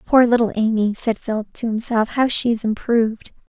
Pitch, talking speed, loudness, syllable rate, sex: 230 Hz, 185 wpm, -19 LUFS, 5.4 syllables/s, female